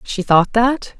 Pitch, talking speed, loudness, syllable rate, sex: 220 Hz, 180 wpm, -15 LUFS, 3.4 syllables/s, female